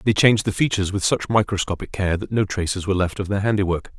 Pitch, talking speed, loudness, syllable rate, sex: 100 Hz, 240 wpm, -21 LUFS, 6.8 syllables/s, male